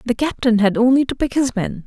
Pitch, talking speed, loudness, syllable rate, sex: 240 Hz, 255 wpm, -17 LUFS, 5.9 syllables/s, female